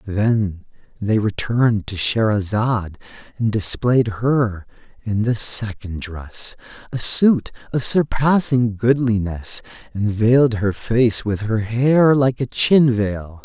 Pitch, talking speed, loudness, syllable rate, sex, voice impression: 110 Hz, 125 wpm, -18 LUFS, 3.5 syllables/s, male, masculine, adult-like, tensed, powerful, bright, soft, slightly raspy, intellectual, calm, friendly, reassuring, slightly wild, lively, kind, slightly modest